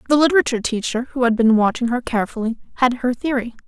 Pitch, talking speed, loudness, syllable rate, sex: 245 Hz, 195 wpm, -19 LUFS, 7.0 syllables/s, female